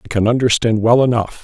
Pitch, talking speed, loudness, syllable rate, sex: 115 Hz, 210 wpm, -15 LUFS, 6.1 syllables/s, male